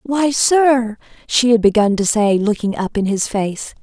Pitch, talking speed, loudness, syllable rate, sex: 225 Hz, 190 wpm, -16 LUFS, 4.1 syllables/s, female